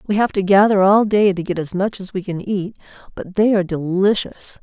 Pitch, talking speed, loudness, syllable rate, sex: 195 Hz, 235 wpm, -17 LUFS, 5.4 syllables/s, female